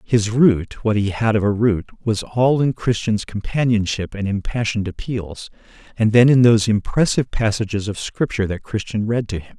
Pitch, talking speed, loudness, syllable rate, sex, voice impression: 110 Hz, 180 wpm, -19 LUFS, 5.2 syllables/s, male, masculine, adult-like, slightly thick, cool, intellectual, slightly calm, slightly elegant